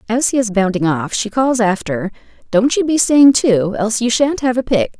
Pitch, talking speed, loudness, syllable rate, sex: 225 Hz, 215 wpm, -15 LUFS, 5.0 syllables/s, female